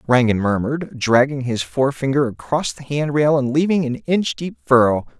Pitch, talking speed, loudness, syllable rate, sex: 135 Hz, 175 wpm, -19 LUFS, 5.1 syllables/s, male